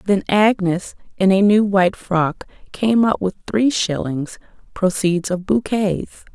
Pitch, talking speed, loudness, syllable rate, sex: 195 Hz, 140 wpm, -18 LUFS, 3.9 syllables/s, female